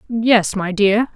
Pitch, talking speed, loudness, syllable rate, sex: 215 Hz, 155 wpm, -16 LUFS, 3.1 syllables/s, female